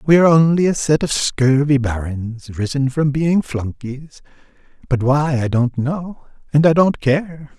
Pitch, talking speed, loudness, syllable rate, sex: 140 Hz, 165 wpm, -17 LUFS, 4.1 syllables/s, male